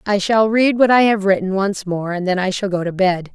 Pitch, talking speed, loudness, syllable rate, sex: 195 Hz, 285 wpm, -17 LUFS, 5.3 syllables/s, female